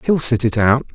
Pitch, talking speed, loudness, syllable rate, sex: 125 Hz, 255 wpm, -16 LUFS, 5.3 syllables/s, male